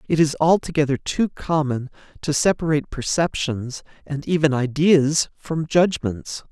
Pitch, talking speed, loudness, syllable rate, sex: 150 Hz, 120 wpm, -21 LUFS, 4.4 syllables/s, male